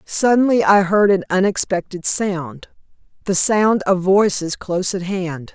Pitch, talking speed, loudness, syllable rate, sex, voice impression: 190 Hz, 130 wpm, -17 LUFS, 4.1 syllables/s, female, feminine, slightly middle-aged, slightly soft, fluent, slightly raspy, slightly intellectual, slightly friendly, reassuring, elegant, slightly sharp